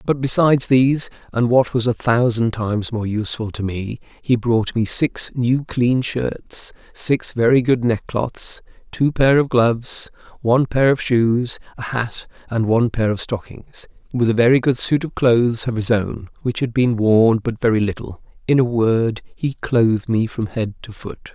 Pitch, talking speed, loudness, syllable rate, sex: 120 Hz, 185 wpm, -19 LUFS, 4.5 syllables/s, male